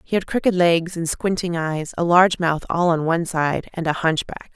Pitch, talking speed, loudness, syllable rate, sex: 170 Hz, 225 wpm, -20 LUFS, 5.1 syllables/s, female